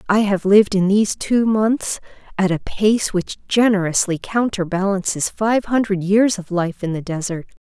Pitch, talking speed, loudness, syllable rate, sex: 200 Hz, 165 wpm, -18 LUFS, 4.7 syllables/s, female